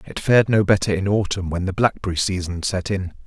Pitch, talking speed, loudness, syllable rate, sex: 95 Hz, 220 wpm, -20 LUFS, 5.9 syllables/s, male